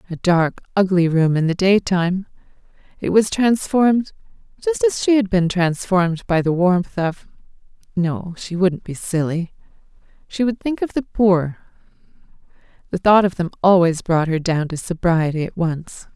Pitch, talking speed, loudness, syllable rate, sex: 180 Hz, 155 wpm, -19 LUFS, 4.6 syllables/s, female